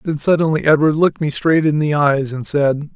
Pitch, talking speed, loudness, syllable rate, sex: 150 Hz, 225 wpm, -16 LUFS, 5.3 syllables/s, male